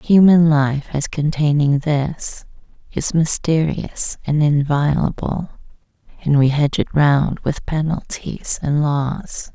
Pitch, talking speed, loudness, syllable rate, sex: 150 Hz, 115 wpm, -18 LUFS, 3.6 syllables/s, female